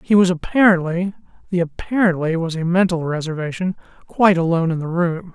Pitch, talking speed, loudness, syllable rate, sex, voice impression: 175 Hz, 135 wpm, -19 LUFS, 5.9 syllables/s, male, slightly masculine, adult-like, muffled, slightly refreshing, unique, slightly kind